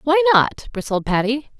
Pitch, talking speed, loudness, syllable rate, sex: 270 Hz, 150 wpm, -18 LUFS, 4.6 syllables/s, female